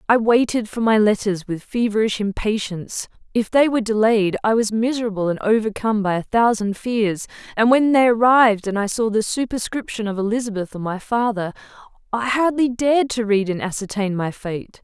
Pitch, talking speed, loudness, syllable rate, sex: 220 Hz, 180 wpm, -20 LUFS, 5.4 syllables/s, female